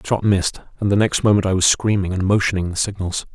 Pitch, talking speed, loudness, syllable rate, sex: 95 Hz, 250 wpm, -19 LUFS, 6.5 syllables/s, male